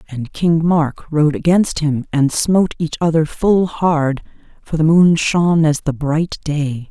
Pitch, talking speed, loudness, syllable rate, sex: 155 Hz, 175 wpm, -16 LUFS, 3.9 syllables/s, female